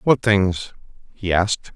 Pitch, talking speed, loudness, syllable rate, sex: 100 Hz, 135 wpm, -20 LUFS, 4.6 syllables/s, male